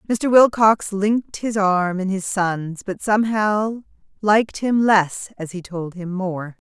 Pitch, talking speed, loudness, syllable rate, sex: 200 Hz, 160 wpm, -19 LUFS, 3.9 syllables/s, female